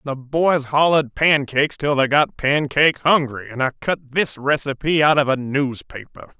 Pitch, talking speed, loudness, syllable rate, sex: 140 Hz, 170 wpm, -18 LUFS, 5.1 syllables/s, male